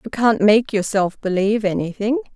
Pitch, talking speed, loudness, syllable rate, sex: 215 Hz, 155 wpm, -18 LUFS, 5.2 syllables/s, female